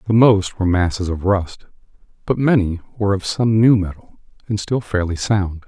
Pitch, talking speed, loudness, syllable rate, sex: 100 Hz, 180 wpm, -18 LUFS, 5.2 syllables/s, male